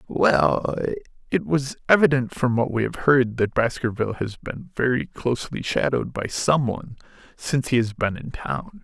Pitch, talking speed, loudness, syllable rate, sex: 125 Hz, 165 wpm, -23 LUFS, 4.8 syllables/s, male